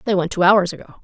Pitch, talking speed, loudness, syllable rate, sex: 185 Hz, 290 wpm, -17 LUFS, 7.2 syllables/s, female